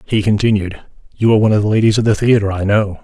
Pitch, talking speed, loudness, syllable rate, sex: 105 Hz, 255 wpm, -14 LUFS, 7.2 syllables/s, male